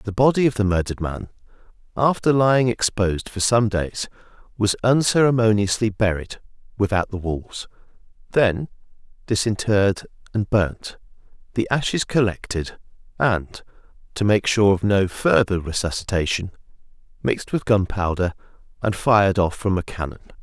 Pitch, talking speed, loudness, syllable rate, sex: 105 Hz, 125 wpm, -21 LUFS, 5.0 syllables/s, male